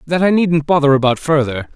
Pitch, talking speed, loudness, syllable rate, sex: 150 Hz, 205 wpm, -14 LUFS, 5.6 syllables/s, male